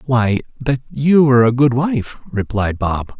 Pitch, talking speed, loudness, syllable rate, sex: 125 Hz, 170 wpm, -16 LUFS, 4.2 syllables/s, male